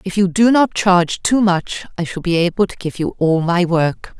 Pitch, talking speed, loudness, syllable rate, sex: 185 Hz, 245 wpm, -16 LUFS, 4.9 syllables/s, female